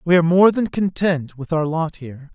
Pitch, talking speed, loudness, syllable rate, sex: 165 Hz, 230 wpm, -18 LUFS, 5.4 syllables/s, male